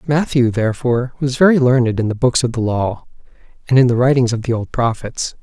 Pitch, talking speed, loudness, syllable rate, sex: 125 Hz, 210 wpm, -16 LUFS, 5.9 syllables/s, male